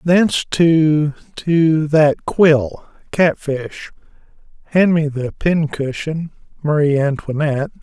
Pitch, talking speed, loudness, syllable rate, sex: 150 Hz, 70 wpm, -17 LUFS, 3.4 syllables/s, male